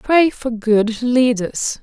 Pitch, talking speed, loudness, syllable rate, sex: 240 Hz, 130 wpm, -17 LUFS, 2.9 syllables/s, female